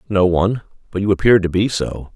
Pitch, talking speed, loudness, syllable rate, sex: 100 Hz, 225 wpm, -17 LUFS, 6.5 syllables/s, male